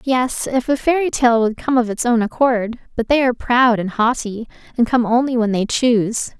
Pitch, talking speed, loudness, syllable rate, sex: 240 Hz, 215 wpm, -17 LUFS, 5.1 syllables/s, female